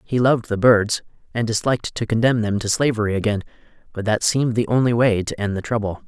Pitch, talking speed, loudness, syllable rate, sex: 110 Hz, 215 wpm, -20 LUFS, 6.2 syllables/s, male